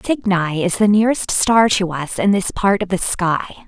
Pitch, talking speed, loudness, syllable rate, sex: 195 Hz, 210 wpm, -17 LUFS, 4.5 syllables/s, female